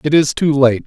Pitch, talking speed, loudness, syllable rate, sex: 140 Hz, 275 wpm, -14 LUFS, 5.2 syllables/s, male